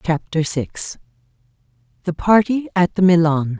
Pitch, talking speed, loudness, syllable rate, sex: 170 Hz, 100 wpm, -18 LUFS, 4.2 syllables/s, female